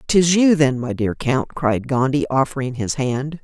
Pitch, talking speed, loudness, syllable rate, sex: 140 Hz, 190 wpm, -19 LUFS, 4.3 syllables/s, female